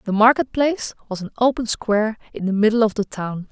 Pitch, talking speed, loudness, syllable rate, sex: 220 Hz, 220 wpm, -20 LUFS, 6.0 syllables/s, female